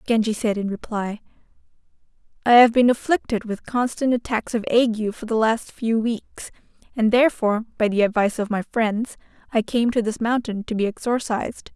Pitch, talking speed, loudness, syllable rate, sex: 225 Hz, 175 wpm, -21 LUFS, 5.2 syllables/s, female